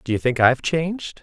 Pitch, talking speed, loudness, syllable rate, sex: 140 Hz, 245 wpm, -20 LUFS, 6.2 syllables/s, male